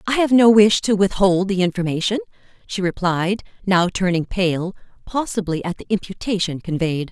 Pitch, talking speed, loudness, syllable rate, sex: 195 Hz, 150 wpm, -19 LUFS, 5.1 syllables/s, female